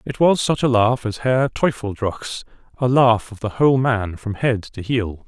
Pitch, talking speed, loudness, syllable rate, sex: 120 Hz, 195 wpm, -19 LUFS, 4.4 syllables/s, male